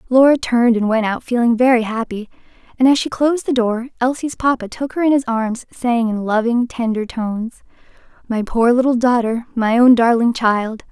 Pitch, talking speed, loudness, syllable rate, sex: 240 Hz, 185 wpm, -17 LUFS, 5.2 syllables/s, female